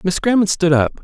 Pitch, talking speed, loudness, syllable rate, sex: 180 Hz, 230 wpm, -16 LUFS, 5.4 syllables/s, male